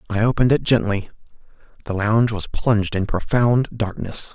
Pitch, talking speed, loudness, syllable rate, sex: 110 Hz, 150 wpm, -20 LUFS, 5.4 syllables/s, male